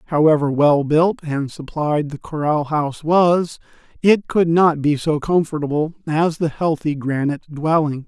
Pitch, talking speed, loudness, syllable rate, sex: 155 Hz, 150 wpm, -18 LUFS, 4.5 syllables/s, male